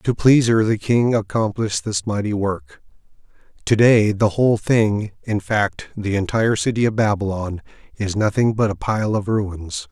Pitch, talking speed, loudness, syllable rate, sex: 105 Hz, 165 wpm, -19 LUFS, 4.7 syllables/s, male